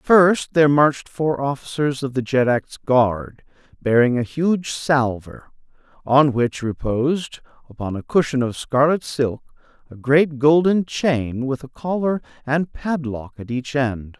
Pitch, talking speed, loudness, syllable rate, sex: 135 Hz, 145 wpm, -20 LUFS, 4.0 syllables/s, male